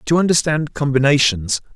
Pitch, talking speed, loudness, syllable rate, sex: 140 Hz, 100 wpm, -17 LUFS, 5.2 syllables/s, male